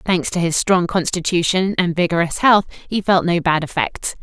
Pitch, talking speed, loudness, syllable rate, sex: 175 Hz, 185 wpm, -17 LUFS, 4.9 syllables/s, female